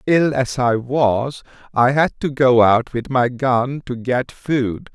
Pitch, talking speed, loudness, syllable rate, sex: 130 Hz, 180 wpm, -18 LUFS, 3.3 syllables/s, male